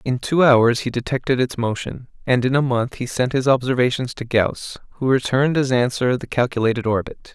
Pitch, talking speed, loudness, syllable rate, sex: 125 Hz, 195 wpm, -19 LUFS, 5.4 syllables/s, male